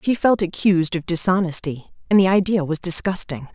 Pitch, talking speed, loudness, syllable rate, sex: 180 Hz, 170 wpm, -19 LUFS, 5.5 syllables/s, female